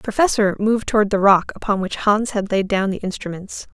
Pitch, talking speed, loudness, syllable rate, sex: 205 Hz, 220 wpm, -19 LUFS, 5.8 syllables/s, female